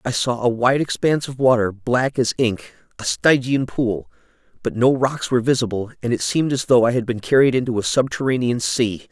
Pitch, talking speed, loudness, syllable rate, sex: 125 Hz, 195 wpm, -19 LUFS, 5.4 syllables/s, male